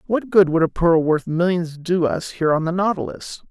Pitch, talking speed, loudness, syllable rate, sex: 170 Hz, 220 wpm, -19 LUFS, 5.2 syllables/s, male